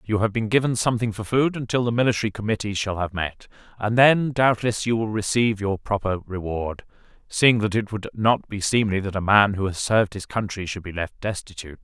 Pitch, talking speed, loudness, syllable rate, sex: 105 Hz, 215 wpm, -22 LUFS, 5.7 syllables/s, male